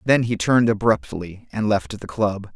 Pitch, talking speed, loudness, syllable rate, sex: 105 Hz, 190 wpm, -21 LUFS, 4.7 syllables/s, male